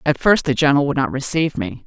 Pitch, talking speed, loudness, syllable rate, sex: 140 Hz, 255 wpm, -18 LUFS, 6.8 syllables/s, female